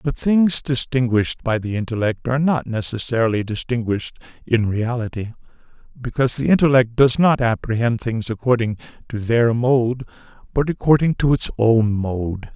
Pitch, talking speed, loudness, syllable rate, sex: 120 Hz, 140 wpm, -19 LUFS, 5.1 syllables/s, male